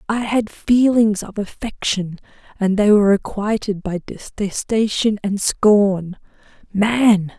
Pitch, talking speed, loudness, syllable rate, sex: 205 Hz, 115 wpm, -18 LUFS, 4.5 syllables/s, female